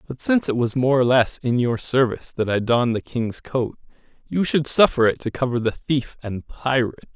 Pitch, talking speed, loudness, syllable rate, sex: 125 Hz, 220 wpm, -21 LUFS, 5.4 syllables/s, male